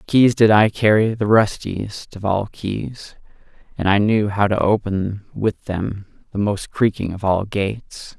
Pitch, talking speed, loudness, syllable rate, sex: 105 Hz, 170 wpm, -19 LUFS, 4.0 syllables/s, male